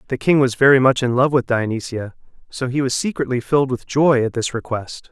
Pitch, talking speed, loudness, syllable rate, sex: 130 Hz, 225 wpm, -18 LUFS, 5.7 syllables/s, male